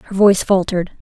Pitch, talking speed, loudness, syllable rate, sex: 190 Hz, 165 wpm, -16 LUFS, 6.2 syllables/s, female